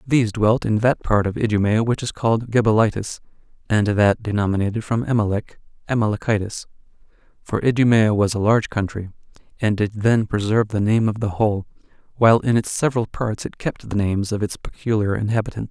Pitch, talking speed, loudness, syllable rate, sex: 110 Hz, 170 wpm, -20 LUFS, 6.0 syllables/s, male